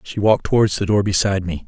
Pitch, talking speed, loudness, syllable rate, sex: 100 Hz, 250 wpm, -18 LUFS, 7.0 syllables/s, male